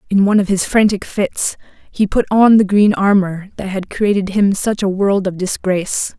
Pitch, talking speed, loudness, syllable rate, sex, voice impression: 195 Hz, 205 wpm, -15 LUFS, 4.9 syllables/s, female, very feminine, very adult-like, thin, tensed, slightly powerful, dark, hard, clear, very fluent, slightly raspy, cool, very intellectual, refreshing, slightly sincere, calm, very friendly, reassuring, unique, elegant, wild, slightly sweet, lively, strict, slightly intense, slightly sharp, light